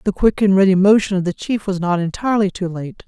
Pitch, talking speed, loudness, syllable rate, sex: 190 Hz, 255 wpm, -17 LUFS, 6.1 syllables/s, female